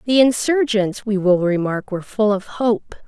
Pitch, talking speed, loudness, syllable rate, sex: 215 Hz, 175 wpm, -19 LUFS, 4.6 syllables/s, female